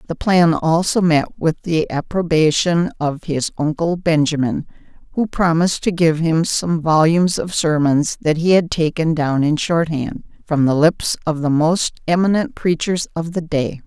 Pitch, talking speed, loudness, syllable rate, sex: 160 Hz, 170 wpm, -17 LUFS, 4.4 syllables/s, female